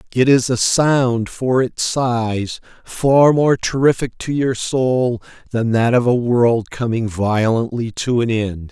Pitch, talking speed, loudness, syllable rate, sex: 120 Hz, 160 wpm, -17 LUFS, 3.5 syllables/s, male